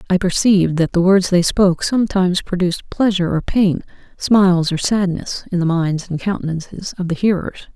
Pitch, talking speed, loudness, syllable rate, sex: 180 Hz, 180 wpm, -17 LUFS, 5.5 syllables/s, female